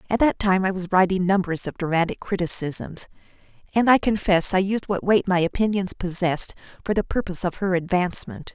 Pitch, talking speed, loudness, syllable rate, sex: 190 Hz, 180 wpm, -22 LUFS, 5.7 syllables/s, female